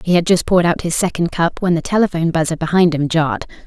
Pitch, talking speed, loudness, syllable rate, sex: 170 Hz, 245 wpm, -16 LUFS, 6.8 syllables/s, female